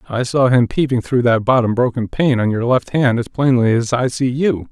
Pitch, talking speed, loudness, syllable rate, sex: 125 Hz, 240 wpm, -16 LUFS, 5.1 syllables/s, male